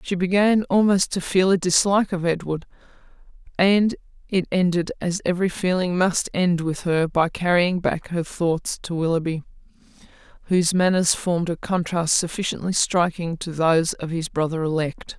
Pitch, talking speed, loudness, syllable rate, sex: 175 Hz, 155 wpm, -21 LUFS, 4.9 syllables/s, female